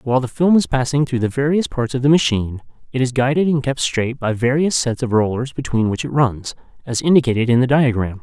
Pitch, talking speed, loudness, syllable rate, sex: 130 Hz, 235 wpm, -18 LUFS, 6.0 syllables/s, male